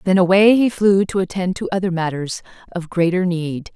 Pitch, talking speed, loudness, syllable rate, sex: 180 Hz, 190 wpm, -18 LUFS, 5.2 syllables/s, female